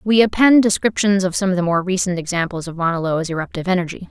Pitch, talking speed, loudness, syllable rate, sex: 185 Hz, 220 wpm, -18 LUFS, 6.7 syllables/s, female